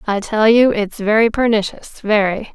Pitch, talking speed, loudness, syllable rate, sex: 215 Hz, 140 wpm, -15 LUFS, 4.6 syllables/s, female